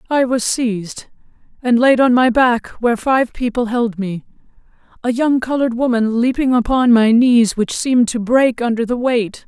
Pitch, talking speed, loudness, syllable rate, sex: 240 Hz, 175 wpm, -15 LUFS, 4.8 syllables/s, female